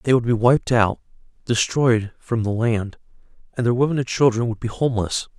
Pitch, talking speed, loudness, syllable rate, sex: 120 Hz, 190 wpm, -20 LUFS, 5.3 syllables/s, male